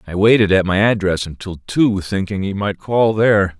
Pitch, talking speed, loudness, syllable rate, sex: 100 Hz, 200 wpm, -16 LUFS, 5.0 syllables/s, male